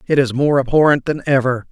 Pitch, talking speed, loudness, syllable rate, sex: 135 Hz, 210 wpm, -16 LUFS, 5.9 syllables/s, male